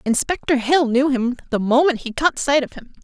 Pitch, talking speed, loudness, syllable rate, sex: 265 Hz, 215 wpm, -19 LUFS, 5.2 syllables/s, female